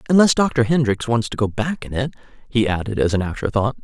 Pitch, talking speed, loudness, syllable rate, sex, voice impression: 120 Hz, 235 wpm, -20 LUFS, 5.9 syllables/s, male, masculine, adult-like, tensed, powerful, clear, fluent, slightly raspy, intellectual, wild, lively, slightly strict, slightly sharp